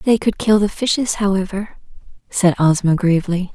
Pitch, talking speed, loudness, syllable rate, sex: 195 Hz, 150 wpm, -17 LUFS, 5.1 syllables/s, female